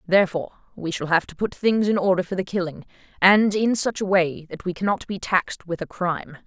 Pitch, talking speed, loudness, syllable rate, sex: 185 Hz, 230 wpm, -22 LUFS, 5.9 syllables/s, female